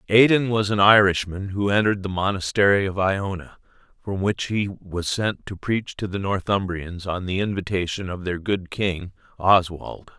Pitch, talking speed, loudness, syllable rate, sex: 95 Hz, 165 wpm, -22 LUFS, 4.6 syllables/s, male